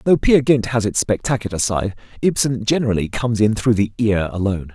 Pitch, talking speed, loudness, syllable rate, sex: 110 Hz, 190 wpm, -18 LUFS, 5.8 syllables/s, male